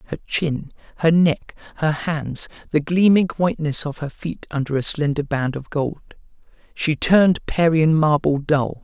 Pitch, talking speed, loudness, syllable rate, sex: 155 Hz, 155 wpm, -20 LUFS, 4.5 syllables/s, male